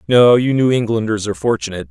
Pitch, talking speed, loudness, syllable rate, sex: 110 Hz, 190 wpm, -15 LUFS, 6.9 syllables/s, male